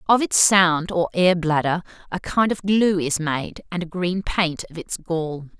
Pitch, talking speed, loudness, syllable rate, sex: 175 Hz, 205 wpm, -21 LUFS, 4.1 syllables/s, female